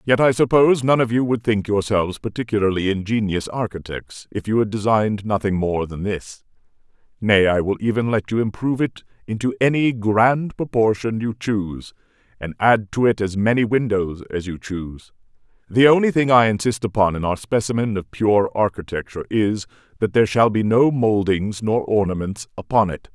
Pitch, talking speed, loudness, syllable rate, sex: 110 Hz, 175 wpm, -20 LUFS, 5.3 syllables/s, male